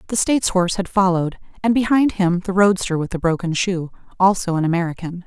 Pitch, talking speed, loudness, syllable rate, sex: 185 Hz, 195 wpm, -19 LUFS, 6.2 syllables/s, female